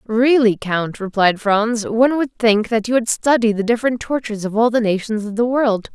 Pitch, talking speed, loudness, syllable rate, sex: 225 Hz, 210 wpm, -17 LUFS, 5.2 syllables/s, female